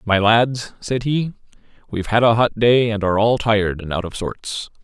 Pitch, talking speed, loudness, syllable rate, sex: 110 Hz, 210 wpm, -18 LUFS, 5.1 syllables/s, male